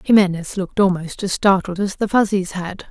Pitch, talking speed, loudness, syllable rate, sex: 190 Hz, 185 wpm, -19 LUFS, 5.4 syllables/s, female